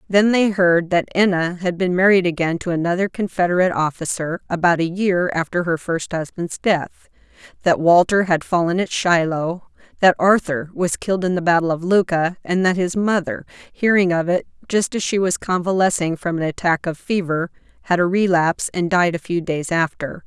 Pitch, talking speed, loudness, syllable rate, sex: 175 Hz, 185 wpm, -19 LUFS, 5.1 syllables/s, female